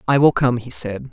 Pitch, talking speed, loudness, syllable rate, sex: 125 Hz, 270 wpm, -18 LUFS, 5.2 syllables/s, female